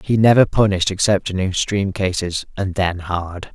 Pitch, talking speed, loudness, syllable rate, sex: 95 Hz, 170 wpm, -18 LUFS, 5.1 syllables/s, male